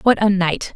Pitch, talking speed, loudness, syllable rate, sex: 195 Hz, 240 wpm, -17 LUFS, 4.8 syllables/s, female